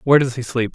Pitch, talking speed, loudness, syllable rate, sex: 125 Hz, 325 wpm, -19 LUFS, 7.7 syllables/s, male